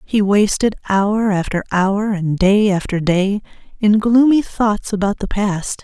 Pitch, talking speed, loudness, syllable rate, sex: 205 Hz, 155 wpm, -16 LUFS, 3.9 syllables/s, female